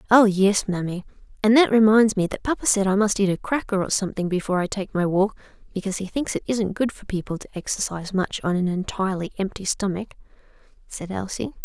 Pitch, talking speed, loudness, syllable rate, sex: 200 Hz, 205 wpm, -22 LUFS, 6.3 syllables/s, female